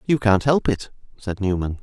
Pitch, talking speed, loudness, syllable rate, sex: 105 Hz, 195 wpm, -21 LUFS, 4.7 syllables/s, male